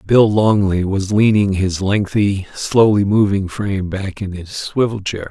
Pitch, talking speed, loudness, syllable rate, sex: 100 Hz, 160 wpm, -16 LUFS, 4.1 syllables/s, male